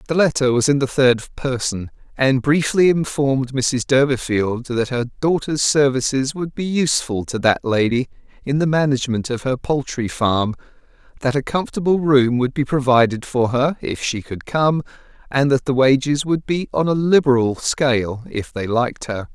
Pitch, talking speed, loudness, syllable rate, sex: 135 Hz, 175 wpm, -19 LUFS, 4.8 syllables/s, male